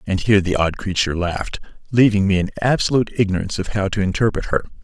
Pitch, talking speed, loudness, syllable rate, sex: 100 Hz, 200 wpm, -19 LUFS, 7.0 syllables/s, male